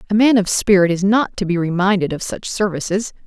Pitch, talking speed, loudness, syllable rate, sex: 195 Hz, 220 wpm, -17 LUFS, 5.8 syllables/s, female